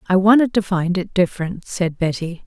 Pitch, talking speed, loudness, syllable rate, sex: 185 Hz, 195 wpm, -19 LUFS, 5.3 syllables/s, female